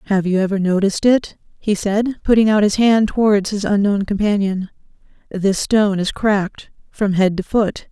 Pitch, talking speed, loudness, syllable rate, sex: 205 Hz, 175 wpm, -17 LUFS, 5.0 syllables/s, female